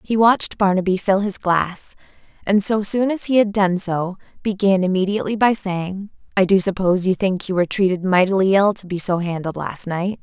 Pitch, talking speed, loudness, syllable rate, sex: 195 Hz, 200 wpm, -19 LUFS, 5.4 syllables/s, female